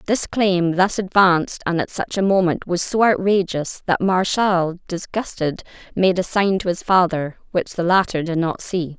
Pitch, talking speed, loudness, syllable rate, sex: 185 Hz, 180 wpm, -19 LUFS, 4.6 syllables/s, female